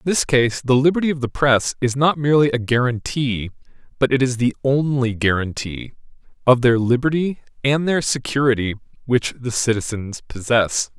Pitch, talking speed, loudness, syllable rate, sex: 130 Hz, 160 wpm, -19 LUFS, 5.0 syllables/s, male